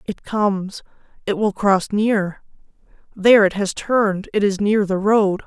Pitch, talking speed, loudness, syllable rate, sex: 200 Hz, 145 wpm, -18 LUFS, 4.4 syllables/s, female